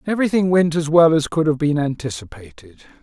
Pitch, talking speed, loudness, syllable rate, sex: 155 Hz, 180 wpm, -17 LUFS, 6.0 syllables/s, male